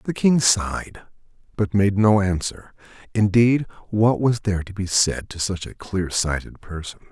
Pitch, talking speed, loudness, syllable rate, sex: 100 Hz, 160 wpm, -21 LUFS, 4.5 syllables/s, male